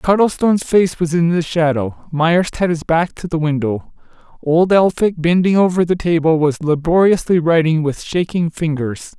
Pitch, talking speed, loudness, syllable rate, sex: 165 Hz, 165 wpm, -16 LUFS, 4.7 syllables/s, male